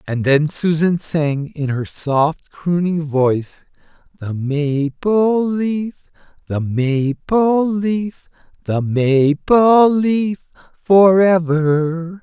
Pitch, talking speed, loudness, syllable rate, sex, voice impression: 165 Hz, 100 wpm, -16 LUFS, 2.6 syllables/s, male, masculine, adult-like, tensed, powerful, bright, clear, slightly halting, friendly, unique, lively, slightly intense